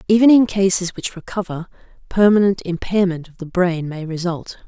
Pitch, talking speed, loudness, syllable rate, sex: 185 Hz, 155 wpm, -18 LUFS, 5.2 syllables/s, female